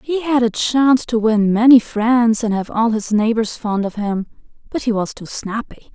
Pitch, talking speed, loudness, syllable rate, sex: 225 Hz, 210 wpm, -17 LUFS, 4.6 syllables/s, female